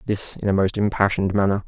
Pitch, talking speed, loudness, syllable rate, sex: 100 Hz, 215 wpm, -21 LUFS, 6.6 syllables/s, male